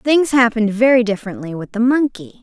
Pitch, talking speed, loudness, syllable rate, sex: 230 Hz, 175 wpm, -16 LUFS, 6.1 syllables/s, female